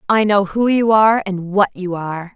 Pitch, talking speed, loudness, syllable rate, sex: 200 Hz, 230 wpm, -16 LUFS, 5.1 syllables/s, female